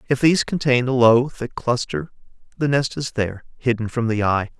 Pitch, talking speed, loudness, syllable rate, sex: 125 Hz, 195 wpm, -20 LUFS, 5.2 syllables/s, male